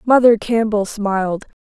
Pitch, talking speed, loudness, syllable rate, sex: 215 Hz, 110 wpm, -17 LUFS, 4.4 syllables/s, female